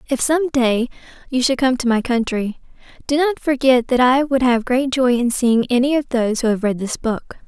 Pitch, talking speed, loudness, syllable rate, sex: 250 Hz, 225 wpm, -18 LUFS, 5.0 syllables/s, female